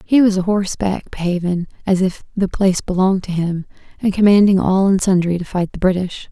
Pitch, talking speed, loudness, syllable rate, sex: 190 Hz, 190 wpm, -17 LUFS, 5.7 syllables/s, female